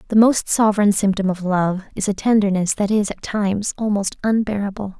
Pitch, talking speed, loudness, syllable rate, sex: 205 Hz, 180 wpm, -19 LUFS, 5.5 syllables/s, female